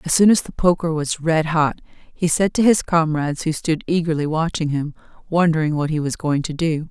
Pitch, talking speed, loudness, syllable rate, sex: 160 Hz, 215 wpm, -19 LUFS, 5.3 syllables/s, female